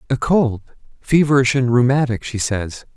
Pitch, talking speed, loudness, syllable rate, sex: 125 Hz, 120 wpm, -17 LUFS, 4.8 syllables/s, male